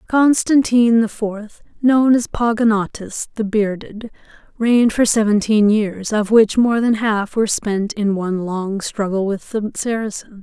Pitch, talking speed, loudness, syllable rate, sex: 215 Hz, 150 wpm, -17 LUFS, 4.4 syllables/s, female